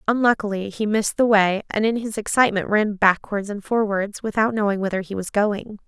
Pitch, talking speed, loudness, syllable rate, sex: 210 Hz, 195 wpm, -21 LUFS, 5.6 syllables/s, female